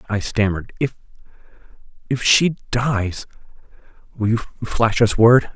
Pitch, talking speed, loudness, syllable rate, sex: 115 Hz, 120 wpm, -19 LUFS, 3.9 syllables/s, male